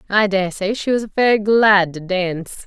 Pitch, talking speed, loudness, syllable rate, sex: 200 Hz, 200 wpm, -17 LUFS, 4.5 syllables/s, female